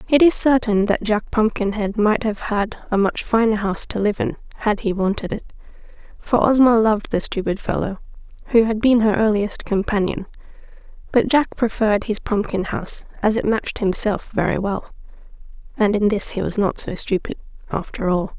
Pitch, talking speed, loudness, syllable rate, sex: 215 Hz, 175 wpm, -20 LUFS, 5.3 syllables/s, female